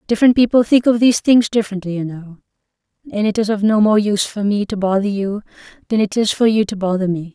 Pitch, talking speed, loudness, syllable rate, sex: 210 Hz, 235 wpm, -16 LUFS, 6.5 syllables/s, female